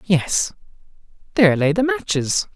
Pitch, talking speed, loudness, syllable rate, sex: 190 Hz, 120 wpm, -19 LUFS, 4.4 syllables/s, male